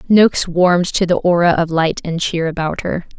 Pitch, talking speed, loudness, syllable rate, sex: 170 Hz, 205 wpm, -16 LUFS, 5.2 syllables/s, female